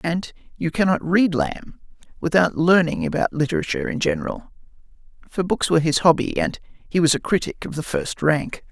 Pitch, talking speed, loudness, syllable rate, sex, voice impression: 160 Hz, 170 wpm, -21 LUFS, 5.4 syllables/s, male, masculine, adult-like, slightly relaxed, slightly weak, slightly halting, raspy, slightly sincere, calm, friendly, kind, modest